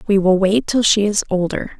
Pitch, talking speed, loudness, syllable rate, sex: 200 Hz, 235 wpm, -16 LUFS, 5.1 syllables/s, female